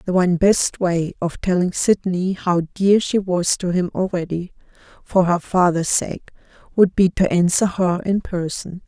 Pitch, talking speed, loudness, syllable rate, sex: 180 Hz, 170 wpm, -19 LUFS, 4.3 syllables/s, female